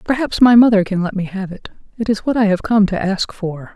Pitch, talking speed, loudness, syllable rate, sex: 205 Hz, 270 wpm, -16 LUFS, 5.6 syllables/s, female